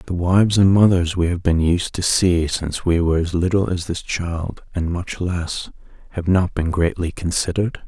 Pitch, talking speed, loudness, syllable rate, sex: 90 Hz, 200 wpm, -19 LUFS, 4.9 syllables/s, male